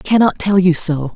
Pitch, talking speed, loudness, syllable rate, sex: 180 Hz, 260 wpm, -14 LUFS, 5.8 syllables/s, female